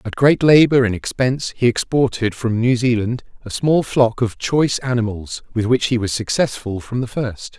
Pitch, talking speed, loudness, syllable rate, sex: 120 Hz, 190 wpm, -18 LUFS, 4.9 syllables/s, male